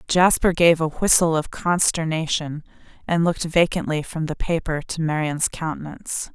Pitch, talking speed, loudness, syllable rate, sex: 160 Hz, 140 wpm, -21 LUFS, 4.9 syllables/s, female